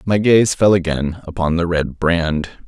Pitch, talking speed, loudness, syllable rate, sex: 85 Hz, 180 wpm, -17 LUFS, 4.1 syllables/s, male